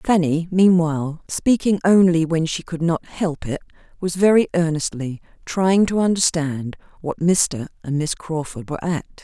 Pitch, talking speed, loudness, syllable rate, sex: 165 Hz, 150 wpm, -20 LUFS, 4.4 syllables/s, female